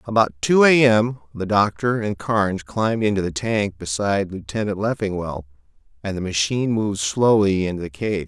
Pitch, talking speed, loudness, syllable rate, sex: 105 Hz, 165 wpm, -20 LUFS, 5.3 syllables/s, male